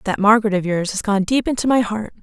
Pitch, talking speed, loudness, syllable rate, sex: 215 Hz, 270 wpm, -18 LUFS, 6.4 syllables/s, female